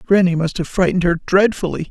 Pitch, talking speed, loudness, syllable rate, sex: 180 Hz, 190 wpm, -17 LUFS, 6.4 syllables/s, male